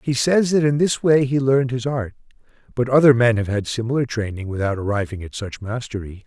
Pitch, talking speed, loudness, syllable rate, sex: 120 Hz, 210 wpm, -20 LUFS, 5.8 syllables/s, male